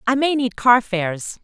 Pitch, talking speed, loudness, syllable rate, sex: 235 Hz, 165 wpm, -18 LUFS, 4.8 syllables/s, female